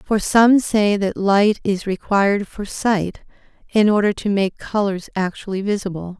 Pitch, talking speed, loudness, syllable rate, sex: 200 Hz, 155 wpm, -19 LUFS, 4.3 syllables/s, female